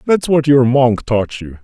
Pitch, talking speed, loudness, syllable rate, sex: 130 Hz, 220 wpm, -13 LUFS, 4.1 syllables/s, male